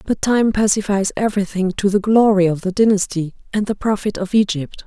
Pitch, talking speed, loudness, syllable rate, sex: 200 Hz, 185 wpm, -17 LUFS, 5.5 syllables/s, female